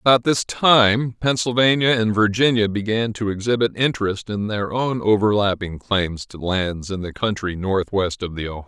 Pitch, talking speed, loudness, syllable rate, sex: 105 Hz, 165 wpm, -20 LUFS, 4.8 syllables/s, male